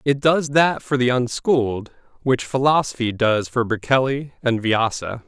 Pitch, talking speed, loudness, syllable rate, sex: 125 Hz, 150 wpm, -20 LUFS, 4.4 syllables/s, male